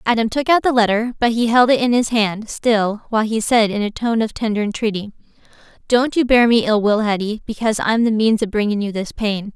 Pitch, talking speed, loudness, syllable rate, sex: 220 Hz, 240 wpm, -17 LUFS, 5.7 syllables/s, female